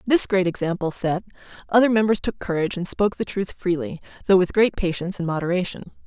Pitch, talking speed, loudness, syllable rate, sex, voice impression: 185 Hz, 190 wpm, -22 LUFS, 6.3 syllables/s, female, feminine, adult-like, tensed, powerful, clear, fluent, intellectual, slightly friendly, reassuring, lively